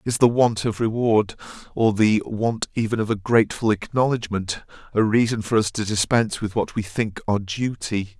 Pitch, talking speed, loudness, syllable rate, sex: 110 Hz, 185 wpm, -22 LUFS, 5.1 syllables/s, male